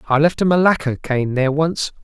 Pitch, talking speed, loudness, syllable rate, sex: 150 Hz, 205 wpm, -17 LUFS, 5.6 syllables/s, male